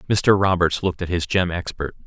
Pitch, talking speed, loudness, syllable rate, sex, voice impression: 90 Hz, 205 wpm, -21 LUFS, 5.7 syllables/s, male, masculine, adult-like, slightly thick, slightly fluent, sincere, slightly friendly